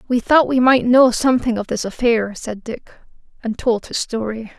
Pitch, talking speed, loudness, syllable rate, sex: 235 Hz, 195 wpm, -17 LUFS, 4.8 syllables/s, female